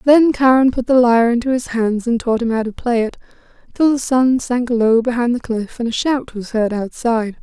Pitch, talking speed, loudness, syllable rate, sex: 240 Hz, 235 wpm, -16 LUFS, 5.2 syllables/s, female